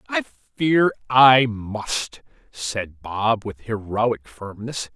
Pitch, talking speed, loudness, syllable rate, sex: 110 Hz, 110 wpm, -21 LUFS, 2.6 syllables/s, male